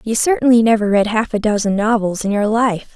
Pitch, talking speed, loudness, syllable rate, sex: 220 Hz, 225 wpm, -15 LUFS, 5.7 syllables/s, female